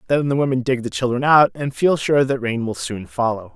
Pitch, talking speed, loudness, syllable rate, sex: 125 Hz, 255 wpm, -19 LUFS, 5.4 syllables/s, male